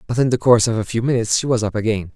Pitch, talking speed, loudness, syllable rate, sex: 115 Hz, 335 wpm, -18 LUFS, 8.0 syllables/s, male